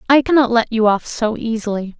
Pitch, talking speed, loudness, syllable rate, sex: 230 Hz, 210 wpm, -17 LUFS, 5.5 syllables/s, female